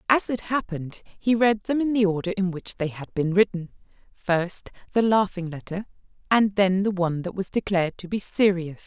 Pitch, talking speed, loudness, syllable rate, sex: 195 Hz, 195 wpm, -24 LUFS, 5.2 syllables/s, female